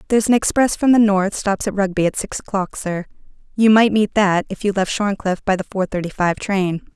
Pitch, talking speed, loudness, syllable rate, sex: 200 Hz, 235 wpm, -18 LUFS, 5.6 syllables/s, female